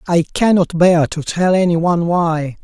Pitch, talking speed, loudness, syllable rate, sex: 170 Hz, 180 wpm, -15 LUFS, 4.7 syllables/s, male